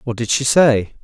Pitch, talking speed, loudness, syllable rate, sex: 125 Hz, 230 wpm, -15 LUFS, 4.6 syllables/s, male